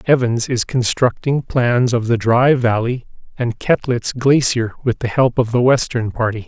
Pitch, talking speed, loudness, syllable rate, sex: 120 Hz, 165 wpm, -17 LUFS, 4.4 syllables/s, male